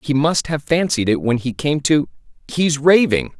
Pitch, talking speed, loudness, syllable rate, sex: 140 Hz, 195 wpm, -17 LUFS, 4.5 syllables/s, male